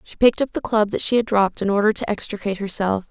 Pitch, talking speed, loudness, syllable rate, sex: 210 Hz, 270 wpm, -20 LUFS, 7.2 syllables/s, female